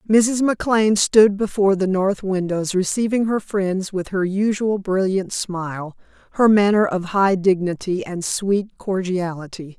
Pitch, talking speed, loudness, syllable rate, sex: 195 Hz, 140 wpm, -19 LUFS, 4.4 syllables/s, female